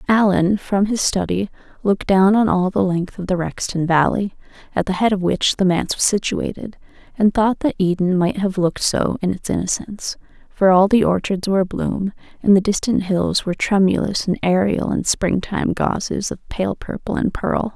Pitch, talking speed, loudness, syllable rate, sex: 195 Hz, 190 wpm, -19 LUFS, 5.1 syllables/s, female